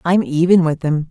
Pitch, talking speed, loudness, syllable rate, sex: 165 Hz, 215 wpm, -15 LUFS, 5.0 syllables/s, female